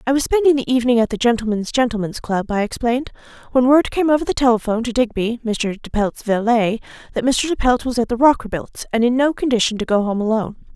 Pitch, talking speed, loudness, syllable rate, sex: 240 Hz, 225 wpm, -18 LUFS, 6.3 syllables/s, female